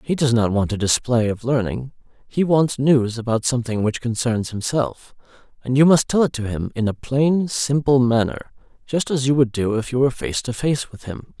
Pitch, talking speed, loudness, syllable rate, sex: 125 Hz, 215 wpm, -20 LUFS, 5.1 syllables/s, male